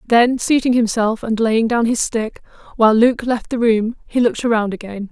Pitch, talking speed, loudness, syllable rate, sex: 230 Hz, 200 wpm, -17 LUFS, 5.0 syllables/s, female